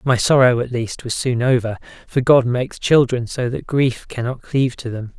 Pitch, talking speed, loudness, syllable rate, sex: 125 Hz, 210 wpm, -18 LUFS, 5.0 syllables/s, male